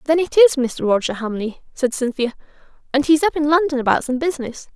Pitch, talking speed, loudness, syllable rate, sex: 275 Hz, 200 wpm, -18 LUFS, 6.0 syllables/s, female